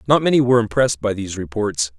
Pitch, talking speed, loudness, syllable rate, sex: 110 Hz, 210 wpm, -18 LUFS, 7.2 syllables/s, male